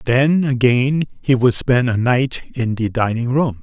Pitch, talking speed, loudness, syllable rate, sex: 125 Hz, 180 wpm, -17 LUFS, 4.0 syllables/s, male